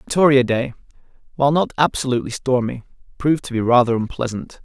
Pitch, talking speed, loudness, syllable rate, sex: 130 Hz, 140 wpm, -19 LUFS, 6.6 syllables/s, male